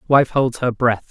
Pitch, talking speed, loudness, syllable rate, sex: 125 Hz, 215 wpm, -18 LUFS, 4.2 syllables/s, male